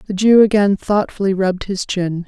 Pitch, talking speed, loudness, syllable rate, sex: 195 Hz, 185 wpm, -16 LUFS, 5.2 syllables/s, female